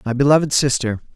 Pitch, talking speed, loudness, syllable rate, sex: 135 Hz, 155 wpm, -17 LUFS, 6.5 syllables/s, male